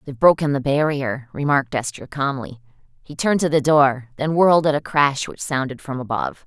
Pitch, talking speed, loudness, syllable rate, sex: 140 Hz, 195 wpm, -20 LUFS, 5.7 syllables/s, female